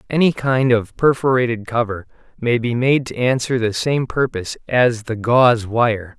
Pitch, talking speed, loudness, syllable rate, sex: 120 Hz, 165 wpm, -18 LUFS, 4.6 syllables/s, male